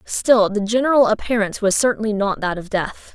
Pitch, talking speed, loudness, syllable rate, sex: 215 Hz, 190 wpm, -18 LUFS, 5.6 syllables/s, female